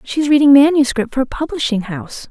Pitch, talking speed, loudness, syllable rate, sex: 270 Hz, 210 wpm, -14 LUFS, 6.3 syllables/s, female